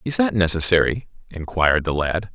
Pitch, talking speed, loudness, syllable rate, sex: 95 Hz, 155 wpm, -19 LUFS, 5.5 syllables/s, male